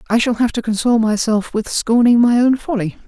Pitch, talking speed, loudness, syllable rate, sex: 225 Hz, 215 wpm, -16 LUFS, 5.7 syllables/s, female